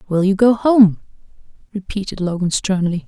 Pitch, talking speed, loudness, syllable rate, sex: 200 Hz, 135 wpm, -16 LUFS, 5.1 syllables/s, female